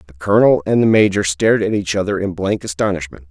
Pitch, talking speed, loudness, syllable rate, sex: 95 Hz, 220 wpm, -16 LUFS, 6.4 syllables/s, male